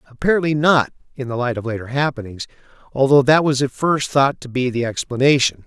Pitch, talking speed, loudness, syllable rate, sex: 130 Hz, 190 wpm, -18 LUFS, 5.9 syllables/s, male